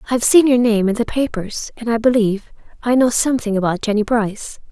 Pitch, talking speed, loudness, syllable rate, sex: 230 Hz, 205 wpm, -17 LUFS, 6.2 syllables/s, female